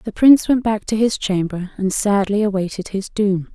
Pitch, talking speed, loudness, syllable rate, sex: 205 Hz, 205 wpm, -18 LUFS, 4.9 syllables/s, female